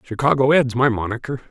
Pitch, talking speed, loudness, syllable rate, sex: 125 Hz, 160 wpm, -18 LUFS, 6.2 syllables/s, male